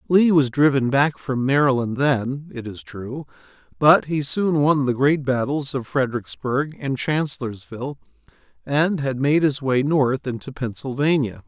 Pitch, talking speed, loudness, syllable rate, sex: 140 Hz, 150 wpm, -21 LUFS, 4.4 syllables/s, male